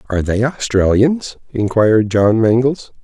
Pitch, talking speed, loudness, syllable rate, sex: 115 Hz, 120 wpm, -15 LUFS, 4.4 syllables/s, male